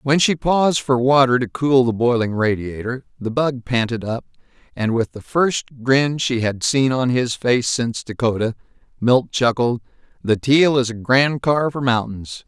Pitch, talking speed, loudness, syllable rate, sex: 125 Hz, 180 wpm, -19 LUFS, 4.5 syllables/s, male